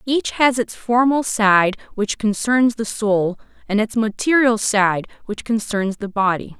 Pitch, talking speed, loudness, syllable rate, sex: 220 Hz, 155 wpm, -18 LUFS, 4.0 syllables/s, female